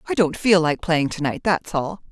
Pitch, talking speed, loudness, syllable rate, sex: 170 Hz, 255 wpm, -21 LUFS, 4.8 syllables/s, female